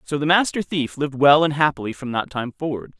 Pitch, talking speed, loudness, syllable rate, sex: 145 Hz, 240 wpm, -20 LUFS, 5.9 syllables/s, male